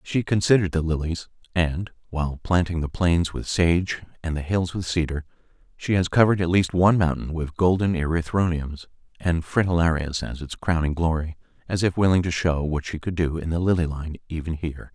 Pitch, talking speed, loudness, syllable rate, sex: 85 Hz, 190 wpm, -23 LUFS, 5.4 syllables/s, male